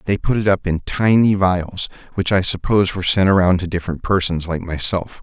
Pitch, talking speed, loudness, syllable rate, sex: 95 Hz, 205 wpm, -18 LUFS, 5.6 syllables/s, male